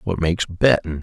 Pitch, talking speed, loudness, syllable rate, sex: 90 Hz, 175 wpm, -19 LUFS, 5.4 syllables/s, male